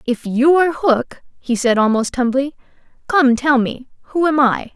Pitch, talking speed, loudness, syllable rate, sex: 265 Hz, 175 wpm, -16 LUFS, 4.6 syllables/s, female